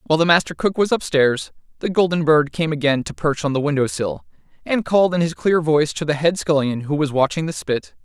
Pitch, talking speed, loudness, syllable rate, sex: 155 Hz, 240 wpm, -19 LUFS, 5.8 syllables/s, male